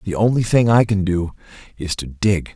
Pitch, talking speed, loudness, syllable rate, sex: 100 Hz, 210 wpm, -18 LUFS, 5.0 syllables/s, male